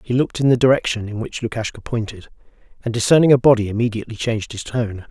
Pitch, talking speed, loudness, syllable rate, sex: 115 Hz, 200 wpm, -19 LUFS, 7.0 syllables/s, male